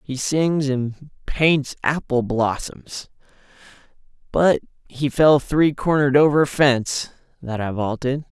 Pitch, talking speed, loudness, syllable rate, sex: 135 Hz, 120 wpm, -20 LUFS, 3.9 syllables/s, male